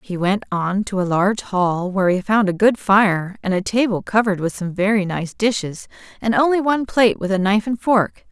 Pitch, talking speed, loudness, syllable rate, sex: 200 Hz, 225 wpm, -18 LUFS, 5.4 syllables/s, female